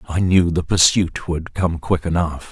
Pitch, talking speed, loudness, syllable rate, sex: 85 Hz, 190 wpm, -18 LUFS, 4.3 syllables/s, male